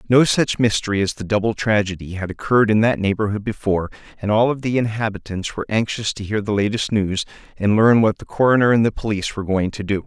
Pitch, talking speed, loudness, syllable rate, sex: 105 Hz, 220 wpm, -19 LUFS, 6.4 syllables/s, male